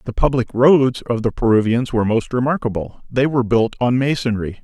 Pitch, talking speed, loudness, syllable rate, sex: 120 Hz, 180 wpm, -18 LUFS, 5.6 syllables/s, male